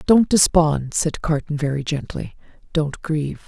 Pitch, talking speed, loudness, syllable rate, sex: 155 Hz, 140 wpm, -20 LUFS, 4.4 syllables/s, female